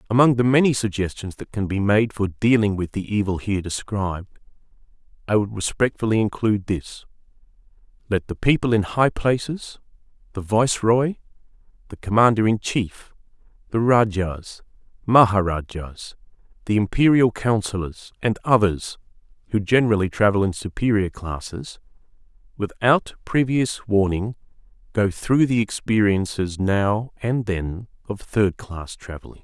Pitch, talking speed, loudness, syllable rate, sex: 105 Hz, 120 wpm, -21 LUFS, 4.7 syllables/s, male